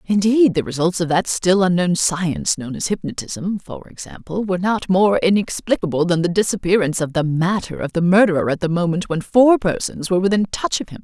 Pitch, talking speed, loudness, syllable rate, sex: 180 Hz, 200 wpm, -18 LUFS, 5.6 syllables/s, female